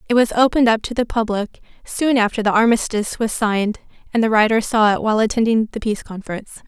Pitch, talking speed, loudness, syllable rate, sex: 220 Hz, 205 wpm, -18 LUFS, 7.0 syllables/s, female